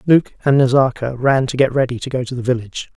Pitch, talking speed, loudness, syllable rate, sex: 130 Hz, 240 wpm, -17 LUFS, 6.3 syllables/s, male